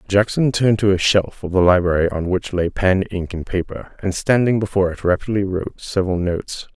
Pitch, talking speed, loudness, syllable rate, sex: 95 Hz, 205 wpm, -19 LUFS, 5.7 syllables/s, male